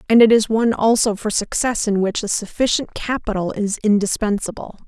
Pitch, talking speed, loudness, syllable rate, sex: 215 Hz, 170 wpm, -18 LUFS, 5.4 syllables/s, female